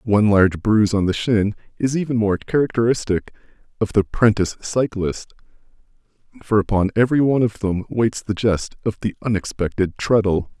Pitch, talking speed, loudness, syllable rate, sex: 105 Hz, 155 wpm, -19 LUFS, 5.5 syllables/s, male